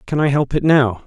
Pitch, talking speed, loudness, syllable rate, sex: 135 Hz, 280 wpm, -16 LUFS, 5.4 syllables/s, male